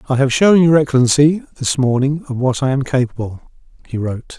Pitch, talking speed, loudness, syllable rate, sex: 135 Hz, 190 wpm, -15 LUFS, 5.5 syllables/s, male